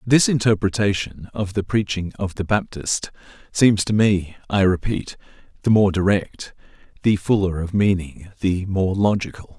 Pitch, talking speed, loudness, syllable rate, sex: 95 Hz, 145 wpm, -20 LUFS, 4.5 syllables/s, male